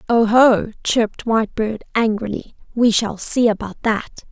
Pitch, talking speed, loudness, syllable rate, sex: 220 Hz, 125 wpm, -18 LUFS, 4.7 syllables/s, female